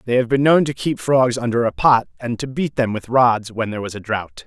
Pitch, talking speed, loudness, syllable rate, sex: 120 Hz, 280 wpm, -19 LUFS, 5.5 syllables/s, male